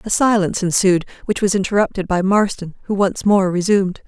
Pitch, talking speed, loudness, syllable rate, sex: 195 Hz, 175 wpm, -17 LUFS, 5.8 syllables/s, female